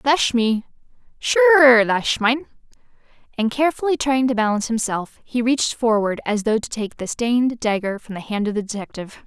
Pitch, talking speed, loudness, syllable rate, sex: 235 Hz, 170 wpm, -19 LUFS, 5.5 syllables/s, female